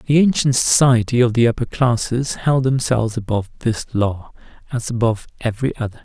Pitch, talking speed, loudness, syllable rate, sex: 120 Hz, 160 wpm, -18 LUFS, 5.8 syllables/s, male